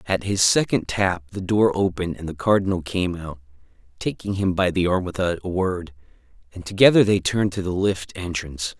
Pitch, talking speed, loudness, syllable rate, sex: 90 Hz, 190 wpm, -22 LUFS, 5.4 syllables/s, male